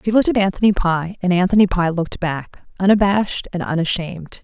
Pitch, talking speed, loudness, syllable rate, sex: 185 Hz, 175 wpm, -18 LUFS, 6.1 syllables/s, female